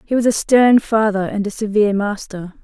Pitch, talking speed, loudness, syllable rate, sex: 210 Hz, 205 wpm, -16 LUFS, 5.2 syllables/s, female